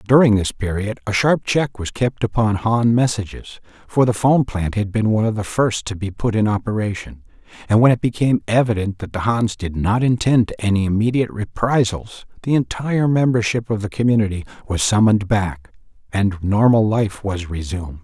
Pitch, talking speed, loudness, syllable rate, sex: 110 Hz, 180 wpm, -19 LUFS, 5.4 syllables/s, male